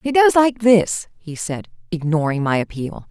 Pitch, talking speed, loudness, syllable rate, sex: 190 Hz, 175 wpm, -18 LUFS, 4.4 syllables/s, female